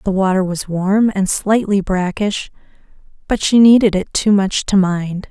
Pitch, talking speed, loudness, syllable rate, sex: 195 Hz, 170 wpm, -15 LUFS, 4.3 syllables/s, female